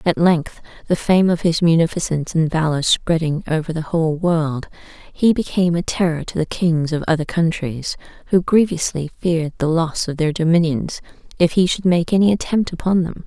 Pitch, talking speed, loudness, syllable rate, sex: 165 Hz, 180 wpm, -18 LUFS, 5.2 syllables/s, female